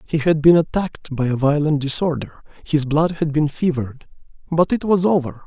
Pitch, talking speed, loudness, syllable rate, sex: 155 Hz, 185 wpm, -19 LUFS, 5.4 syllables/s, male